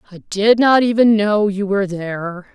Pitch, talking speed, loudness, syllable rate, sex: 205 Hz, 190 wpm, -16 LUFS, 4.8 syllables/s, female